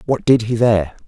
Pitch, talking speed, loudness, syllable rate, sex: 110 Hz, 225 wpm, -16 LUFS, 5.9 syllables/s, male